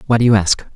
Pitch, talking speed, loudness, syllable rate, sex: 110 Hz, 320 wpm, -14 LUFS, 7.4 syllables/s, male